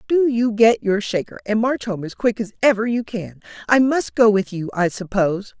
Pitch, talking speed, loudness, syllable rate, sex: 215 Hz, 225 wpm, -19 LUFS, 5.0 syllables/s, female